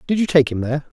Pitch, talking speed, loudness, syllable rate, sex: 145 Hz, 305 wpm, -18 LUFS, 7.8 syllables/s, male